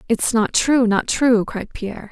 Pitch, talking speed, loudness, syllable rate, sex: 230 Hz, 200 wpm, -18 LUFS, 4.3 syllables/s, female